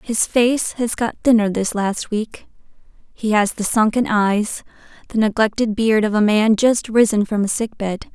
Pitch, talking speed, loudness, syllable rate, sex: 215 Hz, 185 wpm, -18 LUFS, 4.4 syllables/s, female